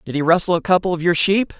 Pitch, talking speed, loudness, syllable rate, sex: 175 Hz, 300 wpm, -17 LUFS, 6.8 syllables/s, male